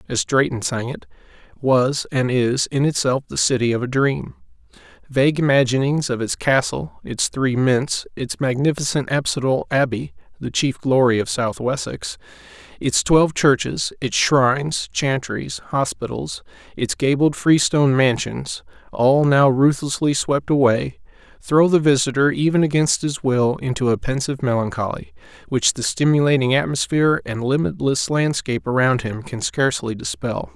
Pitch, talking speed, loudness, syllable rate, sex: 135 Hz, 135 wpm, -19 LUFS, 4.7 syllables/s, male